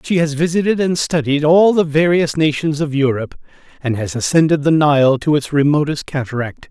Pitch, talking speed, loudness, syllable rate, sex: 150 Hz, 180 wpm, -15 LUFS, 5.3 syllables/s, male